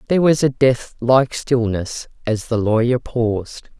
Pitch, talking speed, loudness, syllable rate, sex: 120 Hz, 160 wpm, -18 LUFS, 4.2 syllables/s, female